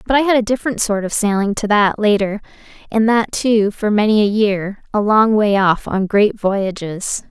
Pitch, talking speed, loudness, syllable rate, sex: 210 Hz, 205 wpm, -16 LUFS, 4.7 syllables/s, female